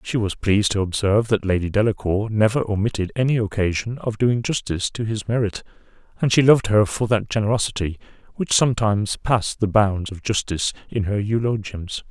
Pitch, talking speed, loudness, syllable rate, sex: 105 Hz, 175 wpm, -21 LUFS, 5.8 syllables/s, male